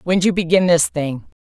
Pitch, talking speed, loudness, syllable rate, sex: 170 Hz, 210 wpm, -17 LUFS, 4.8 syllables/s, female